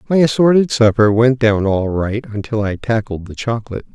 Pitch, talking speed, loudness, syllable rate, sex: 115 Hz, 180 wpm, -16 LUFS, 5.6 syllables/s, male